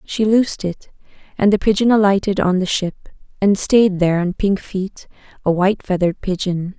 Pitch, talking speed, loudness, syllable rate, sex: 195 Hz, 175 wpm, -17 LUFS, 5.3 syllables/s, female